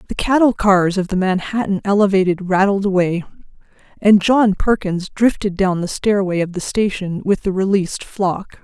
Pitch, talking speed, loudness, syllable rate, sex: 195 Hz, 160 wpm, -17 LUFS, 4.9 syllables/s, female